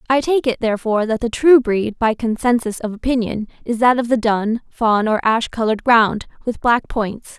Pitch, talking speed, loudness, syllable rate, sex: 230 Hz, 205 wpm, -18 LUFS, 5.0 syllables/s, female